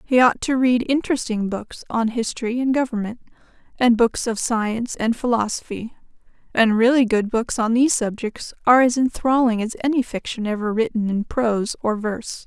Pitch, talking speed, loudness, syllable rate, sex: 230 Hz, 170 wpm, -20 LUFS, 5.3 syllables/s, female